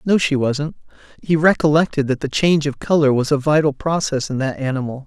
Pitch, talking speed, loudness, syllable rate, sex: 145 Hz, 200 wpm, -18 LUFS, 5.8 syllables/s, male